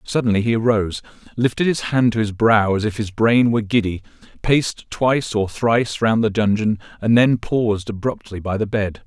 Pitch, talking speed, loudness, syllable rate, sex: 110 Hz, 190 wpm, -19 LUFS, 5.4 syllables/s, male